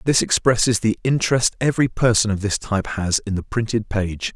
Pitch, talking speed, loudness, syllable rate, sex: 110 Hz, 195 wpm, -20 LUFS, 5.6 syllables/s, male